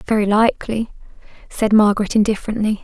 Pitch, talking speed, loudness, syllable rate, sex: 215 Hz, 105 wpm, -17 LUFS, 6.6 syllables/s, female